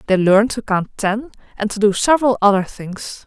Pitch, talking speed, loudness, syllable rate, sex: 215 Hz, 200 wpm, -17 LUFS, 5.4 syllables/s, female